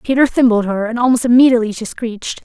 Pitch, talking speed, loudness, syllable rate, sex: 235 Hz, 195 wpm, -14 LUFS, 6.9 syllables/s, female